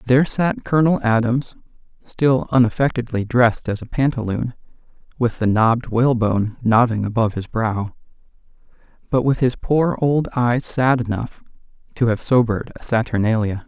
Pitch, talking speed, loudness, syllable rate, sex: 120 Hz, 135 wpm, -19 LUFS, 5.2 syllables/s, male